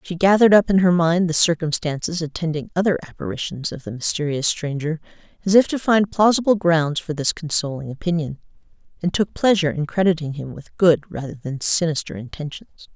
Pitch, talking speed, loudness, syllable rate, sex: 165 Hz, 170 wpm, -20 LUFS, 5.7 syllables/s, female